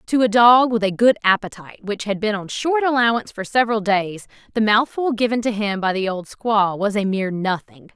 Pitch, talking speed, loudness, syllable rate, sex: 215 Hz, 220 wpm, -19 LUFS, 5.5 syllables/s, female